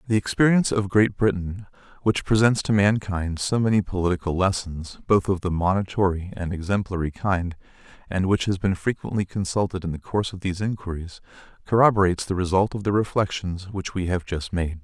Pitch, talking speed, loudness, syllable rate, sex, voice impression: 95 Hz, 175 wpm, -23 LUFS, 5.7 syllables/s, male, masculine, adult-like, slightly thick, cool, sincere, slightly calm, slightly kind